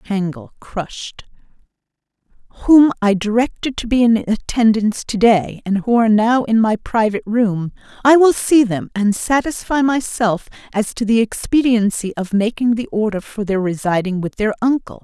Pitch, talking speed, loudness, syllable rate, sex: 220 Hz, 155 wpm, -17 LUFS, 4.9 syllables/s, female